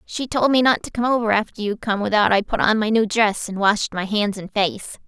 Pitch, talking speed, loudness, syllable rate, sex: 215 Hz, 270 wpm, -20 LUFS, 5.3 syllables/s, female